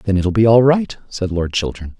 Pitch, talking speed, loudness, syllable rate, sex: 105 Hz, 240 wpm, -16 LUFS, 4.8 syllables/s, male